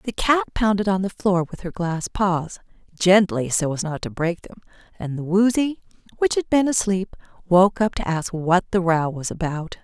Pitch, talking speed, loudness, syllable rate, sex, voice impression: 185 Hz, 190 wpm, -21 LUFS, 4.7 syllables/s, female, feminine, adult-like, tensed, bright, halting, friendly, unique, slightly intense, slightly sharp